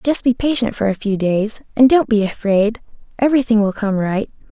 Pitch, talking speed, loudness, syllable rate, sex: 225 Hz, 200 wpm, -17 LUFS, 5.3 syllables/s, female